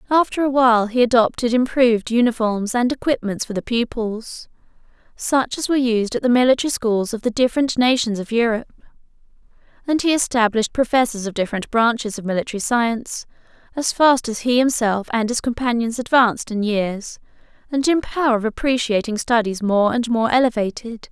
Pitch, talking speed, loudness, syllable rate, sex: 235 Hz, 160 wpm, -19 LUFS, 5.6 syllables/s, female